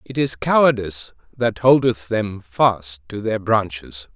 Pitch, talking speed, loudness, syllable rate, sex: 105 Hz, 145 wpm, -19 LUFS, 4.0 syllables/s, male